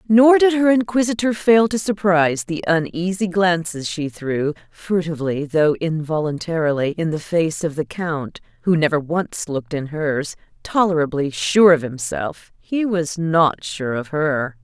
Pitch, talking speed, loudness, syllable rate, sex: 170 Hz, 150 wpm, -19 LUFS, 4.3 syllables/s, female